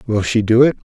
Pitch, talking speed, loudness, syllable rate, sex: 115 Hz, 265 wpm, -15 LUFS, 6.2 syllables/s, male